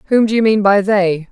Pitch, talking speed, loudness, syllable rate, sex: 205 Hz, 275 wpm, -13 LUFS, 5.5 syllables/s, female